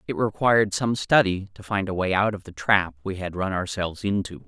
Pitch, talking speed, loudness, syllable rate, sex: 100 Hz, 230 wpm, -24 LUFS, 5.5 syllables/s, male